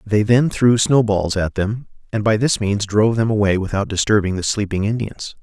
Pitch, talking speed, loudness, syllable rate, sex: 105 Hz, 210 wpm, -18 LUFS, 5.2 syllables/s, male